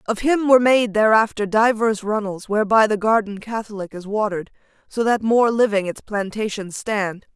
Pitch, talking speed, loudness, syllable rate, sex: 215 Hz, 165 wpm, -19 LUFS, 5.1 syllables/s, female